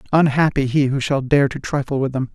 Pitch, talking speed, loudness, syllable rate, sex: 140 Hz, 230 wpm, -19 LUFS, 5.8 syllables/s, male